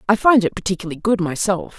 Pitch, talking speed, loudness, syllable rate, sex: 195 Hz, 200 wpm, -18 LUFS, 6.9 syllables/s, female